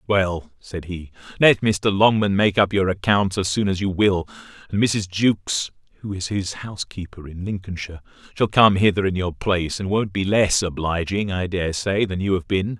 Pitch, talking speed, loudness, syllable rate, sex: 95 Hz, 195 wpm, -21 LUFS, 4.2 syllables/s, male